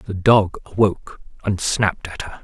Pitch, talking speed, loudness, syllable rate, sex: 100 Hz, 170 wpm, -20 LUFS, 4.8 syllables/s, male